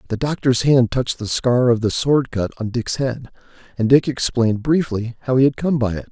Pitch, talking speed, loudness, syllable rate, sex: 125 Hz, 225 wpm, -18 LUFS, 5.4 syllables/s, male